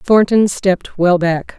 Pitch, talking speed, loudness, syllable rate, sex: 185 Hz, 150 wpm, -14 LUFS, 4.0 syllables/s, female